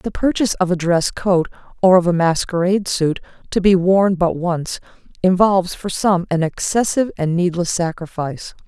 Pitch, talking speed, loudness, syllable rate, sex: 180 Hz, 165 wpm, -17 LUFS, 5.1 syllables/s, female